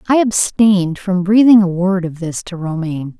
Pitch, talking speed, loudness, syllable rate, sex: 185 Hz, 190 wpm, -14 LUFS, 5.0 syllables/s, female